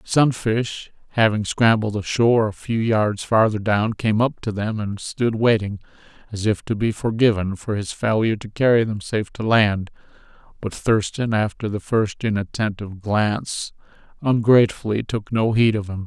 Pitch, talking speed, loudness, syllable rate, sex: 110 Hz, 160 wpm, -21 LUFS, 4.8 syllables/s, male